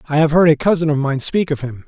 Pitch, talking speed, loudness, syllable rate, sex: 150 Hz, 320 wpm, -16 LUFS, 6.5 syllables/s, male